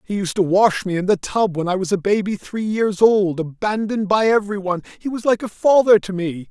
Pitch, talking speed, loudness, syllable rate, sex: 200 Hz, 250 wpm, -19 LUFS, 5.6 syllables/s, male